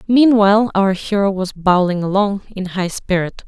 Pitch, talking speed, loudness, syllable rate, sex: 195 Hz, 155 wpm, -16 LUFS, 4.8 syllables/s, female